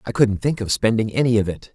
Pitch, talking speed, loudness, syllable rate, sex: 110 Hz, 275 wpm, -20 LUFS, 6.1 syllables/s, male